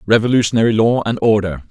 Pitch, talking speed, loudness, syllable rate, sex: 110 Hz, 140 wpm, -15 LUFS, 6.6 syllables/s, male